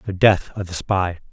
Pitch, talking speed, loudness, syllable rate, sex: 95 Hz, 225 wpm, -20 LUFS, 4.7 syllables/s, male